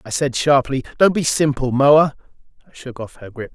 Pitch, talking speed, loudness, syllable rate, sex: 135 Hz, 205 wpm, -16 LUFS, 5.1 syllables/s, male